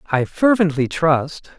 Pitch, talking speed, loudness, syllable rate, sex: 160 Hz, 115 wpm, -18 LUFS, 3.9 syllables/s, male